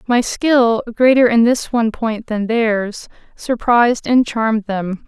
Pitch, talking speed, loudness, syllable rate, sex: 230 Hz, 155 wpm, -16 LUFS, 4.0 syllables/s, female